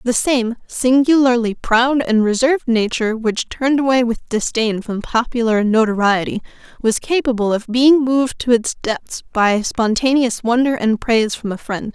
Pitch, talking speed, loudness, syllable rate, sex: 235 Hz, 155 wpm, -17 LUFS, 4.7 syllables/s, female